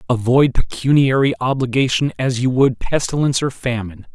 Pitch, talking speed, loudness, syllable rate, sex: 125 Hz, 130 wpm, -17 LUFS, 5.5 syllables/s, male